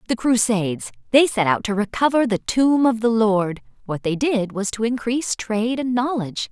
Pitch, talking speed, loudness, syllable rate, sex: 225 Hz, 175 wpm, -20 LUFS, 5.2 syllables/s, female